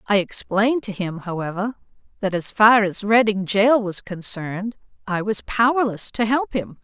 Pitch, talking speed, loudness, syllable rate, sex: 210 Hz, 165 wpm, -20 LUFS, 4.7 syllables/s, female